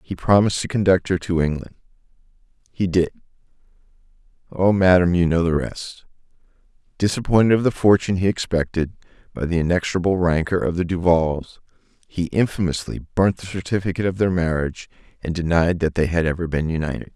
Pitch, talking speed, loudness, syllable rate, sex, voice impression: 90 Hz, 145 wpm, -20 LUFS, 5.9 syllables/s, male, very masculine, adult-like, slightly thick, cool, slightly sincere, slightly calm, slightly kind